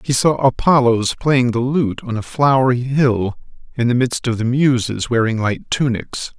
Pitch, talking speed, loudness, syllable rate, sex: 125 Hz, 180 wpm, -17 LUFS, 4.5 syllables/s, male